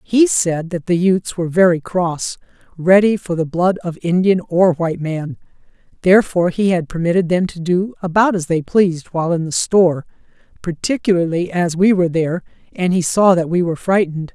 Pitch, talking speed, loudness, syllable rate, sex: 175 Hz, 175 wpm, -16 LUFS, 5.4 syllables/s, female